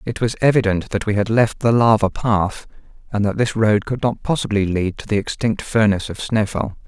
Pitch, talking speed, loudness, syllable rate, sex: 110 Hz, 210 wpm, -19 LUFS, 5.3 syllables/s, male